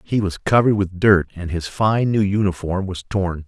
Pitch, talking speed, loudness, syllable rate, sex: 95 Hz, 205 wpm, -19 LUFS, 5.0 syllables/s, male